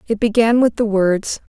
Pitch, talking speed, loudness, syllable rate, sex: 215 Hz, 195 wpm, -16 LUFS, 4.6 syllables/s, female